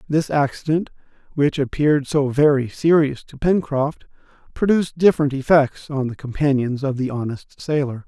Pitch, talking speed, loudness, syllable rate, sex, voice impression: 145 Hz, 140 wpm, -20 LUFS, 5.0 syllables/s, male, very masculine, very adult-like, slightly old, very thick, slightly tensed, powerful, slightly dark, hard, slightly muffled, fluent, slightly raspy, cool, slightly intellectual, sincere, very calm, very mature, very friendly, reassuring, unique, slightly elegant, wild, slightly sweet, slightly lively, strict